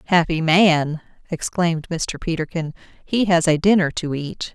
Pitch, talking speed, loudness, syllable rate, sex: 165 Hz, 145 wpm, -20 LUFS, 4.6 syllables/s, female